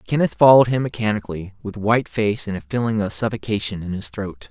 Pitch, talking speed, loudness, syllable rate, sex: 110 Hz, 200 wpm, -20 LUFS, 6.3 syllables/s, male